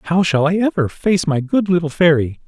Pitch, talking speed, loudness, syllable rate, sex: 170 Hz, 220 wpm, -16 LUFS, 5.4 syllables/s, male